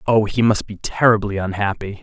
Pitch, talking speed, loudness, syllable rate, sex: 105 Hz, 180 wpm, -19 LUFS, 5.3 syllables/s, male